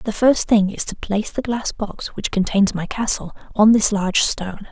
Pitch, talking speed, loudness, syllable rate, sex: 210 Hz, 215 wpm, -19 LUFS, 4.9 syllables/s, female